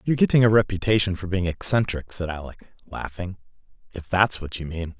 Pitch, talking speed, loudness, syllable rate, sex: 95 Hz, 180 wpm, -23 LUFS, 5.7 syllables/s, male